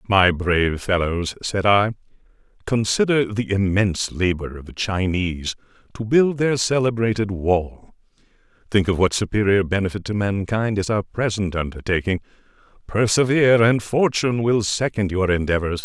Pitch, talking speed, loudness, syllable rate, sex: 100 Hz, 135 wpm, -20 LUFS, 4.9 syllables/s, male